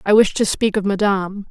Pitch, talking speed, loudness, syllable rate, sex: 200 Hz, 240 wpm, -18 LUFS, 5.7 syllables/s, female